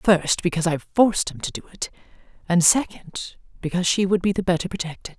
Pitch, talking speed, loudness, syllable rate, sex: 180 Hz, 195 wpm, -22 LUFS, 6.3 syllables/s, female